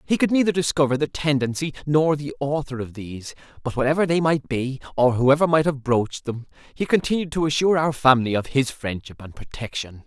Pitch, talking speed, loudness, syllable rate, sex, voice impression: 140 Hz, 195 wpm, -22 LUFS, 5.8 syllables/s, male, masculine, adult-like, tensed, powerful, bright, clear, fluent, intellectual, friendly, slightly wild, lively, slightly intense